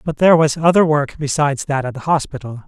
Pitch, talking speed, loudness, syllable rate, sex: 145 Hz, 225 wpm, -16 LUFS, 6.3 syllables/s, male